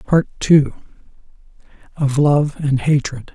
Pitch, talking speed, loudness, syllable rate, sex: 140 Hz, 110 wpm, -17 LUFS, 3.5 syllables/s, male